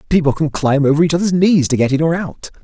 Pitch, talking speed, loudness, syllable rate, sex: 155 Hz, 275 wpm, -15 LUFS, 6.4 syllables/s, male